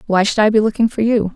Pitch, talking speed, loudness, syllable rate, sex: 215 Hz, 310 wpm, -15 LUFS, 6.7 syllables/s, female